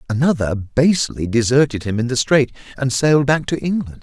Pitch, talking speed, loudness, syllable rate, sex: 130 Hz, 180 wpm, -17 LUFS, 5.5 syllables/s, male